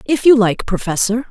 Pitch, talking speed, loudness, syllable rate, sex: 230 Hz, 185 wpm, -15 LUFS, 5.3 syllables/s, female